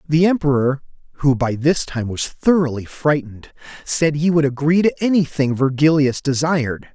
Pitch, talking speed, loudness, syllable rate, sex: 145 Hz, 145 wpm, -18 LUFS, 4.9 syllables/s, male